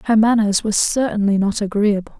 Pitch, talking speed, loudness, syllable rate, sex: 210 Hz, 165 wpm, -17 LUFS, 6.1 syllables/s, female